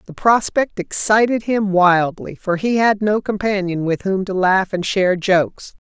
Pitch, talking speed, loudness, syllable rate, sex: 195 Hz, 175 wpm, -17 LUFS, 4.5 syllables/s, female